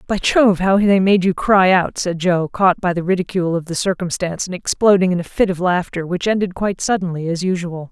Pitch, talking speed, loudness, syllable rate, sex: 185 Hz, 225 wpm, -17 LUFS, 5.7 syllables/s, female